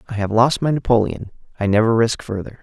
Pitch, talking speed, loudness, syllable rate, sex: 115 Hz, 205 wpm, -18 LUFS, 6.1 syllables/s, male